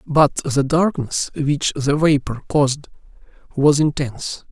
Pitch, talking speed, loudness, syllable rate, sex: 140 Hz, 120 wpm, -19 LUFS, 3.9 syllables/s, male